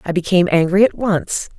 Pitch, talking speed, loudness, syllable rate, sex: 180 Hz, 190 wpm, -16 LUFS, 5.6 syllables/s, female